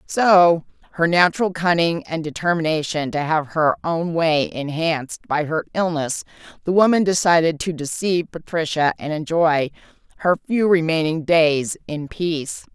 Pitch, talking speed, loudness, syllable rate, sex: 165 Hz, 135 wpm, -20 LUFS, 4.6 syllables/s, female